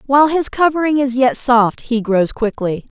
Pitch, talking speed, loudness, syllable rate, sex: 255 Hz, 180 wpm, -15 LUFS, 4.7 syllables/s, female